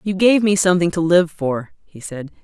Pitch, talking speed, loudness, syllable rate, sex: 175 Hz, 220 wpm, -17 LUFS, 5.2 syllables/s, female